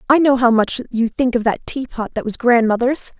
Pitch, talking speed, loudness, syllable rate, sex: 240 Hz, 225 wpm, -17 LUFS, 5.2 syllables/s, female